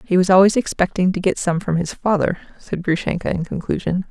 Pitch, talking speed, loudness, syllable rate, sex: 180 Hz, 205 wpm, -19 LUFS, 5.8 syllables/s, female